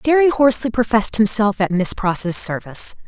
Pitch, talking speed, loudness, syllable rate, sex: 220 Hz, 155 wpm, -16 LUFS, 5.5 syllables/s, female